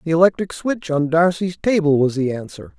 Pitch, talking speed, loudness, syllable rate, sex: 165 Hz, 195 wpm, -19 LUFS, 5.3 syllables/s, male